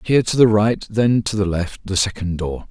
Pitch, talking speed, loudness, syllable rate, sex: 105 Hz, 220 wpm, -18 LUFS, 5.1 syllables/s, male